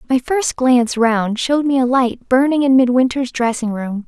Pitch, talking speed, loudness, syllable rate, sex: 250 Hz, 190 wpm, -16 LUFS, 4.9 syllables/s, female